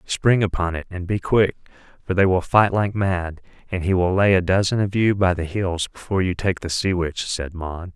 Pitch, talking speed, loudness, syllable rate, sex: 95 Hz, 235 wpm, -21 LUFS, 5.0 syllables/s, male